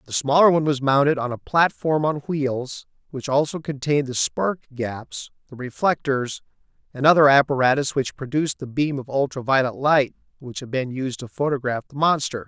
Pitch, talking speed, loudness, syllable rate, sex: 135 Hz, 180 wpm, -21 LUFS, 5.2 syllables/s, male